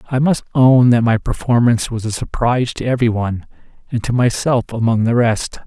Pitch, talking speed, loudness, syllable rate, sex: 120 Hz, 170 wpm, -16 LUFS, 5.6 syllables/s, male